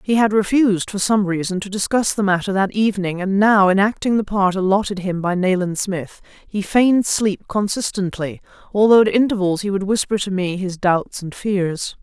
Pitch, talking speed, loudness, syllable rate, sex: 195 Hz, 190 wpm, -18 LUFS, 5.1 syllables/s, female